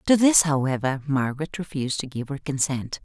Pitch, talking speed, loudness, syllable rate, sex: 145 Hz, 180 wpm, -23 LUFS, 5.7 syllables/s, female